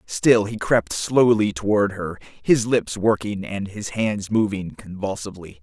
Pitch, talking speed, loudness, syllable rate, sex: 100 Hz, 150 wpm, -21 LUFS, 4.1 syllables/s, male